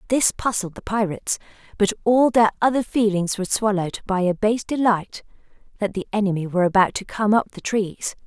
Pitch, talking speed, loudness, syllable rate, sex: 205 Hz, 180 wpm, -21 LUFS, 5.7 syllables/s, female